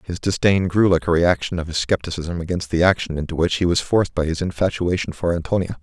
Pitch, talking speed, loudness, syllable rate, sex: 90 Hz, 225 wpm, -20 LUFS, 6.2 syllables/s, male